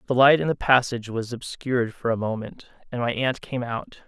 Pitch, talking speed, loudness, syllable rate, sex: 120 Hz, 220 wpm, -24 LUFS, 5.5 syllables/s, male